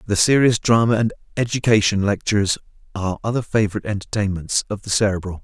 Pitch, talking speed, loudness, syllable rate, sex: 105 Hz, 145 wpm, -20 LUFS, 6.8 syllables/s, male